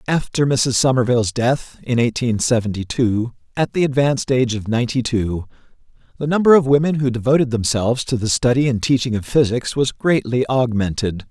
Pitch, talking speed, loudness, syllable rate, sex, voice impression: 125 Hz, 170 wpm, -18 LUFS, 5.5 syllables/s, male, masculine, adult-like, tensed, powerful, bright, clear, fluent, intellectual, friendly, wild, lively, slightly intense